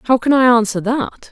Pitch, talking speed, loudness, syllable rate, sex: 240 Hz, 230 wpm, -15 LUFS, 4.7 syllables/s, female